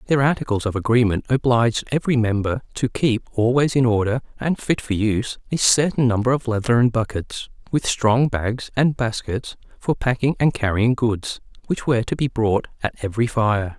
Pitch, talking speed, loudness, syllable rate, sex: 120 Hz, 175 wpm, -20 LUFS, 5.1 syllables/s, male